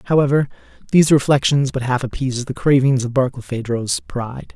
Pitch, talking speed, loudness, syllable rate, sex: 130 Hz, 145 wpm, -18 LUFS, 5.9 syllables/s, male